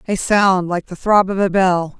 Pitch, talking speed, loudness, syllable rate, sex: 185 Hz, 240 wpm, -16 LUFS, 4.4 syllables/s, female